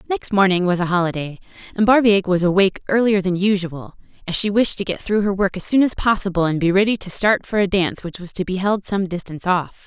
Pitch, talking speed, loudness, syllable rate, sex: 190 Hz, 245 wpm, -19 LUFS, 6.1 syllables/s, female